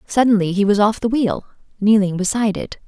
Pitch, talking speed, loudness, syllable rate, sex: 210 Hz, 190 wpm, -17 LUFS, 5.8 syllables/s, female